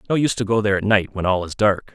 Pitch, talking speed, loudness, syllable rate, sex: 105 Hz, 340 wpm, -19 LUFS, 7.4 syllables/s, male